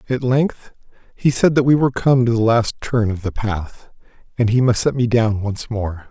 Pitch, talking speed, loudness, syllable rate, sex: 120 Hz, 225 wpm, -18 LUFS, 4.8 syllables/s, male